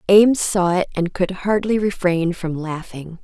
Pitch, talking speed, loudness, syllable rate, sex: 185 Hz, 165 wpm, -19 LUFS, 4.4 syllables/s, female